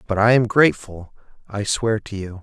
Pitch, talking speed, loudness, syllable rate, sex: 105 Hz, 200 wpm, -19 LUFS, 5.2 syllables/s, male